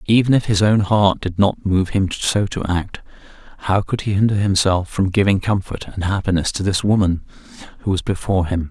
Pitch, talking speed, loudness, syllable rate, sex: 95 Hz, 200 wpm, -18 LUFS, 5.4 syllables/s, male